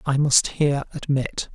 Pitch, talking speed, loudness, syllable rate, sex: 140 Hz, 155 wpm, -21 LUFS, 4.6 syllables/s, male